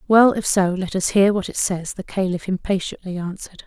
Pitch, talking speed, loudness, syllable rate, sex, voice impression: 190 Hz, 215 wpm, -20 LUFS, 5.4 syllables/s, female, feminine, adult-like, relaxed, weak, dark, soft, slightly fluent, calm, elegant, kind, modest